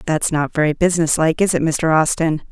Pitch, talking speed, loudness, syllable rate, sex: 160 Hz, 215 wpm, -17 LUFS, 5.6 syllables/s, female